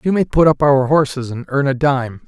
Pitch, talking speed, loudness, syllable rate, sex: 140 Hz, 265 wpm, -16 LUFS, 5.2 syllables/s, male